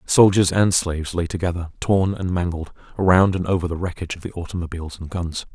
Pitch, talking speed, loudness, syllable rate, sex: 90 Hz, 195 wpm, -21 LUFS, 6.2 syllables/s, male